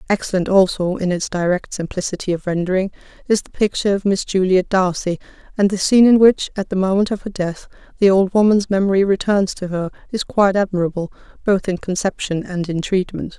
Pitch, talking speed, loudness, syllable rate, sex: 190 Hz, 190 wpm, -18 LUFS, 5.9 syllables/s, female